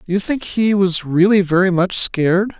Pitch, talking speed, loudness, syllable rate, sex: 190 Hz, 210 wpm, -15 LUFS, 4.9 syllables/s, male